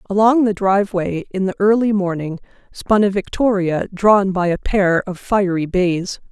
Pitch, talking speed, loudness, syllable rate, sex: 195 Hz, 160 wpm, -17 LUFS, 4.5 syllables/s, female